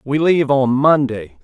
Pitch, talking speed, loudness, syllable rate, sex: 135 Hz, 170 wpm, -15 LUFS, 4.6 syllables/s, male